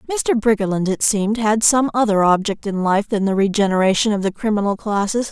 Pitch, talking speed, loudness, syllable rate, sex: 210 Hz, 190 wpm, -18 LUFS, 5.7 syllables/s, female